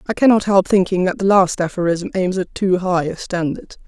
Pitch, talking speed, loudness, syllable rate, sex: 185 Hz, 215 wpm, -17 LUFS, 5.3 syllables/s, female